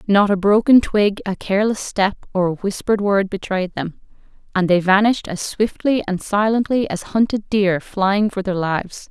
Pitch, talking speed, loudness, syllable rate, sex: 200 Hz, 180 wpm, -18 LUFS, 4.9 syllables/s, female